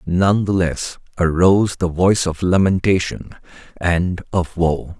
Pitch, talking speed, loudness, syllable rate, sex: 90 Hz, 130 wpm, -18 LUFS, 4.1 syllables/s, male